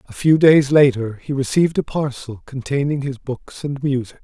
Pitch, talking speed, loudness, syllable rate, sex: 135 Hz, 185 wpm, -18 LUFS, 4.9 syllables/s, male